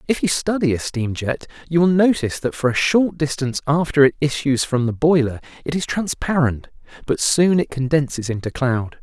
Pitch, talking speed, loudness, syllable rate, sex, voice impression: 145 Hz, 195 wpm, -19 LUFS, 5.3 syllables/s, male, masculine, adult-like, tensed, slightly powerful, clear, fluent, intellectual, friendly, reassuring, wild, slightly lively, kind